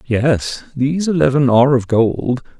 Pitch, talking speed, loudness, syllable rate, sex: 130 Hz, 140 wpm, -15 LUFS, 4.6 syllables/s, male